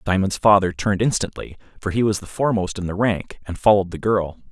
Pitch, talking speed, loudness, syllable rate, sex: 100 Hz, 215 wpm, -20 LUFS, 6.3 syllables/s, male